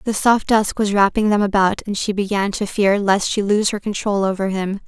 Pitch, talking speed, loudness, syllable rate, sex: 205 Hz, 235 wpm, -18 LUFS, 5.1 syllables/s, female